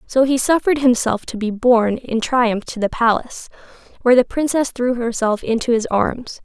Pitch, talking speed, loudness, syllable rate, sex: 240 Hz, 185 wpm, -18 LUFS, 5.2 syllables/s, female